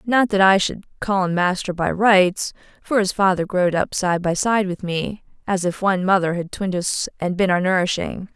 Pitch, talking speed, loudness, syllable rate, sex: 185 Hz, 210 wpm, -20 LUFS, 5.0 syllables/s, female